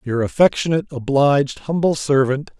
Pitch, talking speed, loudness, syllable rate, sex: 145 Hz, 115 wpm, -18 LUFS, 5.5 syllables/s, male